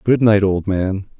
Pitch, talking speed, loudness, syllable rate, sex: 100 Hz, 200 wpm, -17 LUFS, 4.1 syllables/s, male